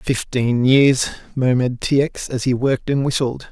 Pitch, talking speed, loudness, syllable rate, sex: 130 Hz, 170 wpm, -18 LUFS, 4.7 syllables/s, male